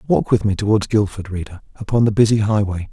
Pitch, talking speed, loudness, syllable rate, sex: 105 Hz, 205 wpm, -18 LUFS, 5.8 syllables/s, male